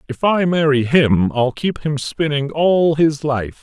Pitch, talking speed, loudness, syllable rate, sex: 145 Hz, 180 wpm, -17 LUFS, 3.8 syllables/s, male